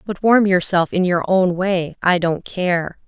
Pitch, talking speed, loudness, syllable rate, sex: 180 Hz, 195 wpm, -18 LUFS, 3.9 syllables/s, female